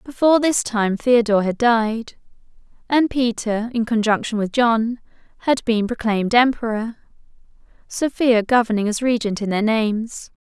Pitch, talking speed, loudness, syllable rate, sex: 230 Hz, 130 wpm, -19 LUFS, 4.7 syllables/s, female